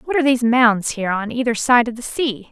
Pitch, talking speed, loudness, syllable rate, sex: 235 Hz, 265 wpm, -18 LUFS, 6.1 syllables/s, female